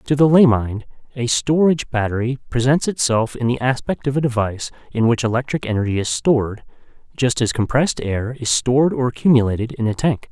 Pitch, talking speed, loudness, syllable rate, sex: 125 Hz, 185 wpm, -18 LUFS, 5.8 syllables/s, male